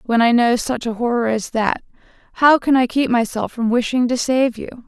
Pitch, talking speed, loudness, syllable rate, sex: 240 Hz, 220 wpm, -18 LUFS, 5.0 syllables/s, female